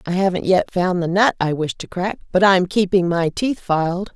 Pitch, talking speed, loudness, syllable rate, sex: 185 Hz, 230 wpm, -19 LUFS, 4.9 syllables/s, female